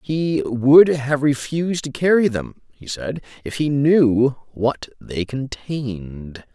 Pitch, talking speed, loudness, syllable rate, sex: 130 Hz, 135 wpm, -19 LUFS, 3.5 syllables/s, male